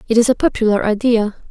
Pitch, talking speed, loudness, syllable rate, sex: 225 Hz, 200 wpm, -16 LUFS, 6.6 syllables/s, female